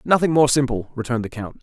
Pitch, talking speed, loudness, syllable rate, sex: 130 Hz, 220 wpm, -20 LUFS, 6.7 syllables/s, male